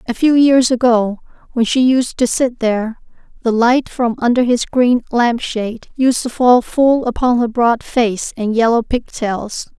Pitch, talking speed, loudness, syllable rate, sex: 240 Hz, 170 wpm, -15 LUFS, 4.2 syllables/s, female